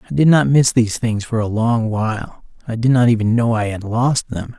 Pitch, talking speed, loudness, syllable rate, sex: 115 Hz, 250 wpm, -17 LUFS, 5.3 syllables/s, male